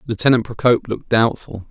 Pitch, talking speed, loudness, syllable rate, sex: 115 Hz, 140 wpm, -17 LUFS, 6.5 syllables/s, male